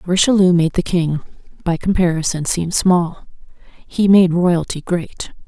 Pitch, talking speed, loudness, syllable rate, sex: 175 Hz, 145 wpm, -16 LUFS, 4.2 syllables/s, female